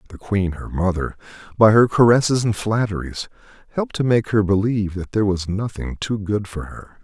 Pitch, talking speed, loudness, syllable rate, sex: 105 Hz, 190 wpm, -20 LUFS, 5.7 syllables/s, male